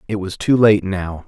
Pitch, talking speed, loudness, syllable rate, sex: 100 Hz, 235 wpm, -17 LUFS, 4.6 syllables/s, male